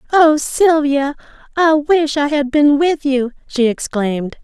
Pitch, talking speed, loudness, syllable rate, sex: 285 Hz, 150 wpm, -15 LUFS, 3.9 syllables/s, female